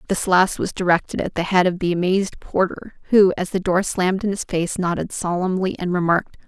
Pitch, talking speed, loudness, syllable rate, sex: 185 Hz, 215 wpm, -20 LUFS, 5.6 syllables/s, female